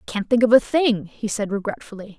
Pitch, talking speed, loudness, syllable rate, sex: 215 Hz, 245 wpm, -20 LUFS, 6.0 syllables/s, female